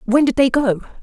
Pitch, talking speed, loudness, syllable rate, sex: 255 Hz, 235 wpm, -16 LUFS, 5.5 syllables/s, female